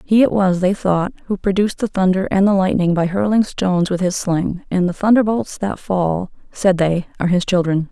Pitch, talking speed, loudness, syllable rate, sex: 190 Hz, 210 wpm, -17 LUFS, 5.2 syllables/s, female